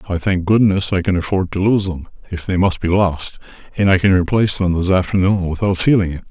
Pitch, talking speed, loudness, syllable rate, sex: 95 Hz, 230 wpm, -16 LUFS, 5.9 syllables/s, male